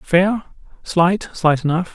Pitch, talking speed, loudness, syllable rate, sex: 175 Hz, 95 wpm, -18 LUFS, 3.3 syllables/s, male